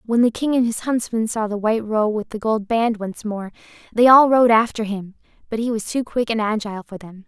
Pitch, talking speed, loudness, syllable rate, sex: 220 Hz, 245 wpm, -19 LUFS, 5.5 syllables/s, female